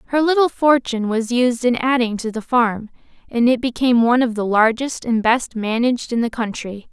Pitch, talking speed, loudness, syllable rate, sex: 240 Hz, 200 wpm, -18 LUFS, 5.4 syllables/s, female